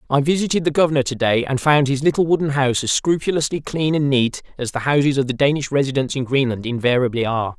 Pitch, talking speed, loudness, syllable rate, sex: 140 Hz, 220 wpm, -19 LUFS, 6.5 syllables/s, male